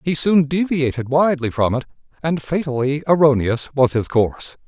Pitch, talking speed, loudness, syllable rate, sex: 145 Hz, 140 wpm, -18 LUFS, 5.2 syllables/s, male